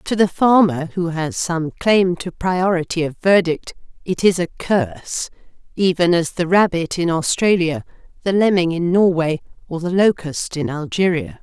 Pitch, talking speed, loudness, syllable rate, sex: 170 Hz, 160 wpm, -18 LUFS, 4.4 syllables/s, female